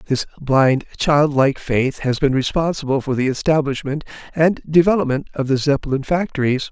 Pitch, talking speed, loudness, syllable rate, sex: 140 Hz, 150 wpm, -18 LUFS, 5.1 syllables/s, male